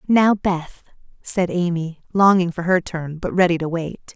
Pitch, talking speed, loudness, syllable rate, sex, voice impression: 175 Hz, 175 wpm, -20 LUFS, 4.3 syllables/s, female, feminine, adult-like, tensed, powerful, clear, intellectual, friendly, elegant, lively, slightly strict